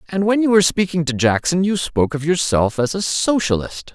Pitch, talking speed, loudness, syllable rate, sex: 165 Hz, 215 wpm, -18 LUFS, 5.6 syllables/s, male